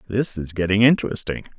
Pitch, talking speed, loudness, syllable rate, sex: 105 Hz, 150 wpm, -21 LUFS, 6.2 syllables/s, male